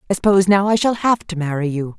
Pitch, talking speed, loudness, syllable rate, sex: 185 Hz, 270 wpm, -17 LUFS, 6.8 syllables/s, female